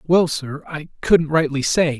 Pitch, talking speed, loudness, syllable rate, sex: 155 Hz, 180 wpm, -19 LUFS, 3.8 syllables/s, male